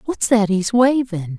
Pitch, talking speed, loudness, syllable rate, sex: 220 Hz, 175 wpm, -17 LUFS, 4.0 syllables/s, female